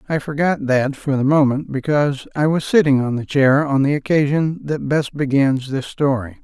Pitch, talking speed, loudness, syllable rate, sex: 140 Hz, 195 wpm, -18 LUFS, 5.0 syllables/s, male